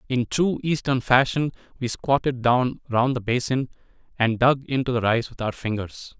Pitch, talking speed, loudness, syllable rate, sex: 125 Hz, 175 wpm, -23 LUFS, 4.7 syllables/s, male